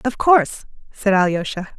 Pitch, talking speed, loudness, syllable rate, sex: 210 Hz, 135 wpm, -18 LUFS, 5.2 syllables/s, female